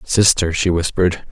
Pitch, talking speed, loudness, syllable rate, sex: 90 Hz, 135 wpm, -16 LUFS, 5.0 syllables/s, male